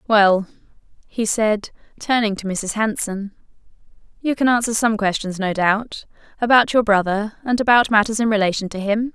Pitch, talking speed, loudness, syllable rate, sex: 215 Hz, 155 wpm, -19 LUFS, 4.9 syllables/s, female